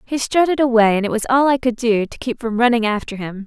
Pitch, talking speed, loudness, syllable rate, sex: 235 Hz, 275 wpm, -17 LUFS, 6.0 syllables/s, female